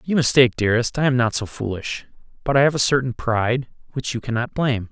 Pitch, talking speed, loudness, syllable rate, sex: 125 Hz, 230 wpm, -20 LUFS, 6.4 syllables/s, male